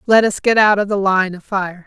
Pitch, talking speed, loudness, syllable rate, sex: 200 Hz, 290 wpm, -15 LUFS, 5.2 syllables/s, female